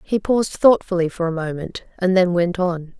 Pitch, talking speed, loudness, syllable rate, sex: 180 Hz, 200 wpm, -19 LUFS, 5.1 syllables/s, female